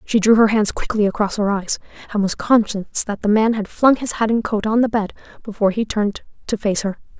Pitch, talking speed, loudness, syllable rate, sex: 215 Hz, 240 wpm, -18 LUFS, 5.7 syllables/s, female